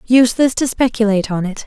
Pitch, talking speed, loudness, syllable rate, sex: 230 Hz, 180 wpm, -15 LUFS, 6.5 syllables/s, female